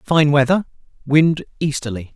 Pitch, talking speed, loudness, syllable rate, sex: 145 Hz, 110 wpm, -18 LUFS, 4.7 syllables/s, male